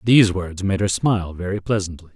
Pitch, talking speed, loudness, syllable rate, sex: 95 Hz, 195 wpm, -20 LUFS, 6.1 syllables/s, male